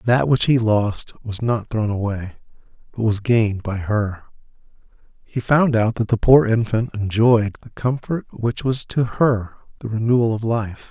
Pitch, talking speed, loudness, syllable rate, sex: 110 Hz, 170 wpm, -20 LUFS, 4.3 syllables/s, male